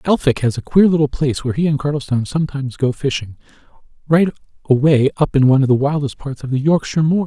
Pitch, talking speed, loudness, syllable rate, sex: 140 Hz, 205 wpm, -17 LUFS, 7.0 syllables/s, male